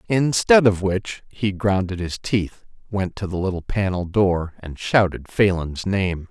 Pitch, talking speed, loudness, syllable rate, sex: 95 Hz, 150 wpm, -21 LUFS, 3.8 syllables/s, male